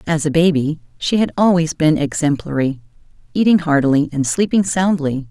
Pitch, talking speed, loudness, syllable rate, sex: 155 Hz, 145 wpm, -17 LUFS, 5.2 syllables/s, female